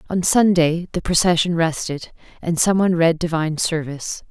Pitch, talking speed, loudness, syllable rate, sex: 170 Hz, 155 wpm, -19 LUFS, 5.3 syllables/s, female